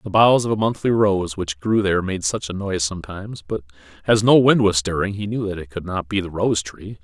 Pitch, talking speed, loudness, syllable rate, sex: 95 Hz, 255 wpm, -20 LUFS, 5.7 syllables/s, male